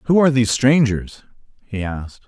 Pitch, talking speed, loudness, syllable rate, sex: 120 Hz, 160 wpm, -17 LUFS, 6.1 syllables/s, male